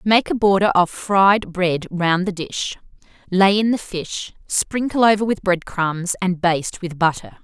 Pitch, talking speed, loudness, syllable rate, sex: 185 Hz, 180 wpm, -19 LUFS, 4.1 syllables/s, female